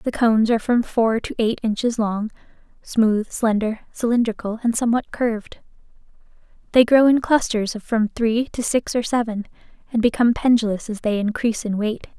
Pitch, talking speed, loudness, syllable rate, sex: 225 Hz, 165 wpm, -20 LUFS, 5.3 syllables/s, female